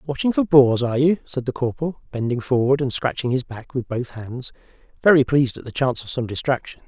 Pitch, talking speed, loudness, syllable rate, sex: 130 Hz, 220 wpm, -21 LUFS, 6.1 syllables/s, male